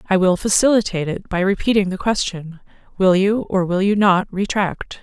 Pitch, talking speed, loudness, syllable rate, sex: 190 Hz, 180 wpm, -18 LUFS, 5.0 syllables/s, female